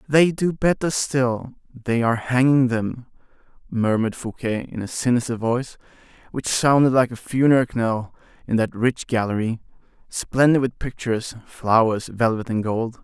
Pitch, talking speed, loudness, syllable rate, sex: 120 Hz, 145 wpm, -21 LUFS, 4.8 syllables/s, male